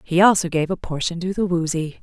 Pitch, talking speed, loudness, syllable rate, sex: 175 Hz, 235 wpm, -20 LUFS, 5.7 syllables/s, female